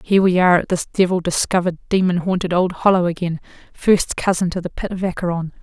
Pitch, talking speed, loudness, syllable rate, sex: 180 Hz, 190 wpm, -18 LUFS, 6.4 syllables/s, female